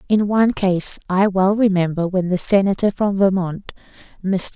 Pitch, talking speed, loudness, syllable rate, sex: 190 Hz, 160 wpm, -18 LUFS, 4.8 syllables/s, female